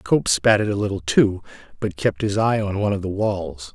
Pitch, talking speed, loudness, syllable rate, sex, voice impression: 100 Hz, 225 wpm, -21 LUFS, 5.1 syllables/s, male, masculine, adult-like, slightly thick, fluent, cool, slightly sincere, slightly reassuring